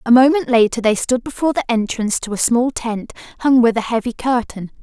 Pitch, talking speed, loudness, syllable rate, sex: 240 Hz, 210 wpm, -17 LUFS, 5.9 syllables/s, female